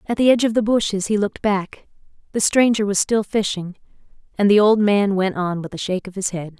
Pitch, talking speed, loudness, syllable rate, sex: 200 Hz, 235 wpm, -19 LUFS, 5.9 syllables/s, female